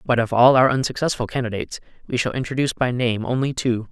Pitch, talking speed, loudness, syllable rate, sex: 120 Hz, 200 wpm, -20 LUFS, 6.8 syllables/s, male